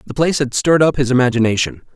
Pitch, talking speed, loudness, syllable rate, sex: 135 Hz, 215 wpm, -15 LUFS, 7.6 syllables/s, male